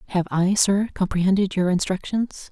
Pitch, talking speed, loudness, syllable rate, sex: 190 Hz, 145 wpm, -21 LUFS, 5.2 syllables/s, female